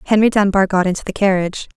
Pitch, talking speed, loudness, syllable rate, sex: 195 Hz, 200 wpm, -16 LUFS, 7.1 syllables/s, female